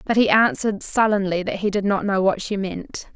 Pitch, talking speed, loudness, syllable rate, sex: 200 Hz, 230 wpm, -20 LUFS, 5.3 syllables/s, female